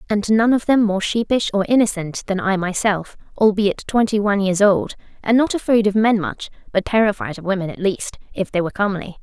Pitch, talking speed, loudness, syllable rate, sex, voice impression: 205 Hz, 210 wpm, -19 LUFS, 5.7 syllables/s, female, very feminine, young, very thin, tensed, very powerful, very bright, slightly soft, very clear, very fluent, slightly raspy, very cute, very intellectual, refreshing, sincere, calm, very friendly, very reassuring, very unique, very elegant, slightly wild, very sweet, very lively, kind, slightly intense, slightly sharp, light